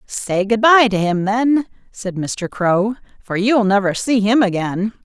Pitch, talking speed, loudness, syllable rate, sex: 210 Hz, 180 wpm, -17 LUFS, 3.9 syllables/s, female